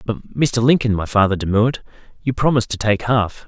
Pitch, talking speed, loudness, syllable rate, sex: 115 Hz, 190 wpm, -18 LUFS, 6.1 syllables/s, male